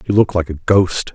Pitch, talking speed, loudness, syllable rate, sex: 90 Hz, 260 wpm, -16 LUFS, 4.8 syllables/s, male